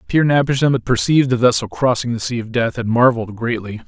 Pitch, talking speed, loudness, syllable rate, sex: 120 Hz, 250 wpm, -17 LUFS, 6.8 syllables/s, male